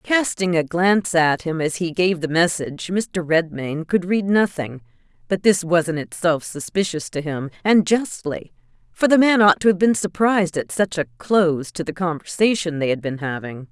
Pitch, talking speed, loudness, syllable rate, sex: 175 Hz, 190 wpm, -20 LUFS, 5.1 syllables/s, female